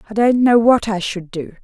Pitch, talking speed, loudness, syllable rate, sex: 215 Hz, 255 wpm, -15 LUFS, 5.0 syllables/s, female